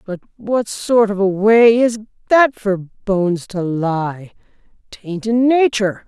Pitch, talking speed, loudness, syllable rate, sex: 210 Hz, 150 wpm, -16 LUFS, 3.5 syllables/s, female